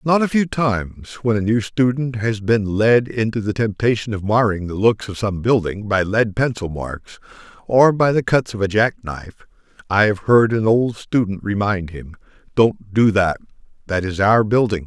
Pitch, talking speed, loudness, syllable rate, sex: 110 Hz, 190 wpm, -18 LUFS, 4.6 syllables/s, male